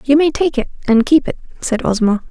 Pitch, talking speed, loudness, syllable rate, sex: 260 Hz, 235 wpm, -15 LUFS, 5.7 syllables/s, female